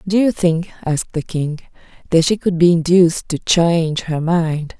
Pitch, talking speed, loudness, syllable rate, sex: 170 Hz, 190 wpm, -17 LUFS, 4.8 syllables/s, female